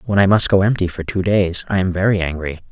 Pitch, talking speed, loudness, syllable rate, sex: 95 Hz, 265 wpm, -17 LUFS, 6.0 syllables/s, male